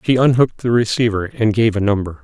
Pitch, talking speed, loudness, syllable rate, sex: 110 Hz, 215 wpm, -16 LUFS, 6.2 syllables/s, male